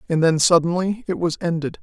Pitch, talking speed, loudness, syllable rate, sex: 170 Hz, 195 wpm, -20 LUFS, 5.7 syllables/s, female